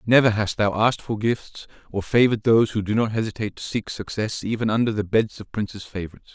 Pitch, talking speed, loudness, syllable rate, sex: 110 Hz, 215 wpm, -23 LUFS, 6.4 syllables/s, male